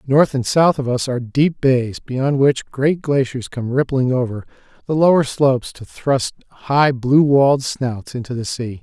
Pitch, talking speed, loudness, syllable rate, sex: 130 Hz, 185 wpm, -18 LUFS, 4.4 syllables/s, male